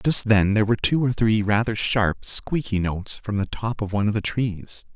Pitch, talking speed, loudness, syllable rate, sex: 110 Hz, 230 wpm, -22 LUFS, 5.3 syllables/s, male